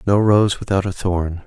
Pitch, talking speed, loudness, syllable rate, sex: 95 Hz, 205 wpm, -18 LUFS, 4.5 syllables/s, male